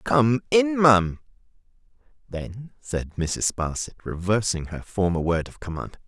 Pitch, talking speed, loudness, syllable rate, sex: 105 Hz, 130 wpm, -24 LUFS, 4.2 syllables/s, male